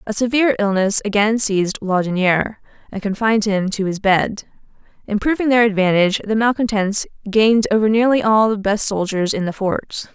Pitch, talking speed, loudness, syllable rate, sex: 210 Hz, 160 wpm, -17 LUFS, 5.6 syllables/s, female